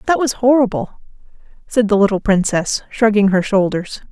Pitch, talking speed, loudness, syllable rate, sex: 210 Hz, 145 wpm, -16 LUFS, 5.1 syllables/s, female